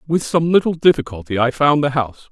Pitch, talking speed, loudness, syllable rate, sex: 145 Hz, 205 wpm, -17 LUFS, 6.4 syllables/s, male